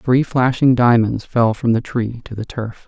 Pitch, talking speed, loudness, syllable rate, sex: 120 Hz, 210 wpm, -17 LUFS, 4.3 syllables/s, male